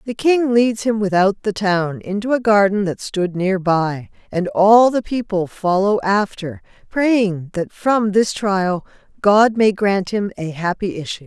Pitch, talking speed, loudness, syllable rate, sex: 200 Hz, 170 wpm, -17 LUFS, 3.9 syllables/s, female